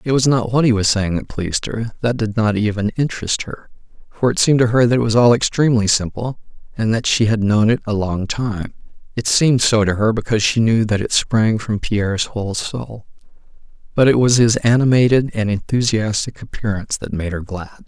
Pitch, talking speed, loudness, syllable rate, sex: 110 Hz, 205 wpm, -17 LUFS, 4.5 syllables/s, male